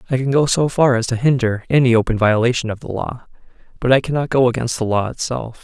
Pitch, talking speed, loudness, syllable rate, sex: 125 Hz, 235 wpm, -17 LUFS, 6.2 syllables/s, male